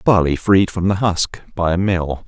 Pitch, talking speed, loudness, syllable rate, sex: 90 Hz, 210 wpm, -17 LUFS, 4.4 syllables/s, male